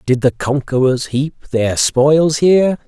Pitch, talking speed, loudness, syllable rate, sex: 140 Hz, 145 wpm, -15 LUFS, 3.7 syllables/s, male